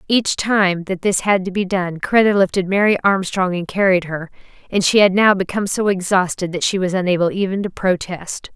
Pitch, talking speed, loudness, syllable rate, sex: 190 Hz, 205 wpm, -17 LUFS, 5.3 syllables/s, female